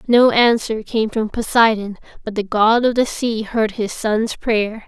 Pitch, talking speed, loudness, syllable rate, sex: 220 Hz, 185 wpm, -17 LUFS, 4.1 syllables/s, female